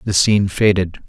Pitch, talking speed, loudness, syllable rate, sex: 100 Hz, 165 wpm, -16 LUFS, 5.7 syllables/s, male